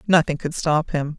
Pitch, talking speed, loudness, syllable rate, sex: 160 Hz, 200 wpm, -21 LUFS, 4.8 syllables/s, female